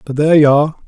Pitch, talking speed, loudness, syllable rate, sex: 150 Hz, 275 wpm, -11 LUFS, 8.8 syllables/s, male